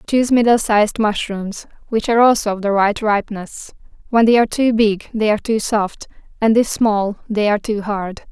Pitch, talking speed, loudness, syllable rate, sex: 215 Hz, 195 wpm, -17 LUFS, 5.4 syllables/s, female